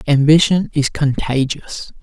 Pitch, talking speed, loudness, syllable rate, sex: 145 Hz, 90 wpm, -16 LUFS, 3.9 syllables/s, male